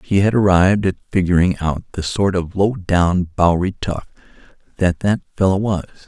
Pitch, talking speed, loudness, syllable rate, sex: 95 Hz, 170 wpm, -18 LUFS, 5.2 syllables/s, male